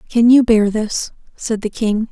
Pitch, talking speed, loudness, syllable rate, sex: 220 Hz, 200 wpm, -15 LUFS, 4.1 syllables/s, female